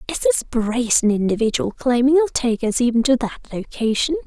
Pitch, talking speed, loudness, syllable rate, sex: 250 Hz, 170 wpm, -19 LUFS, 5.5 syllables/s, female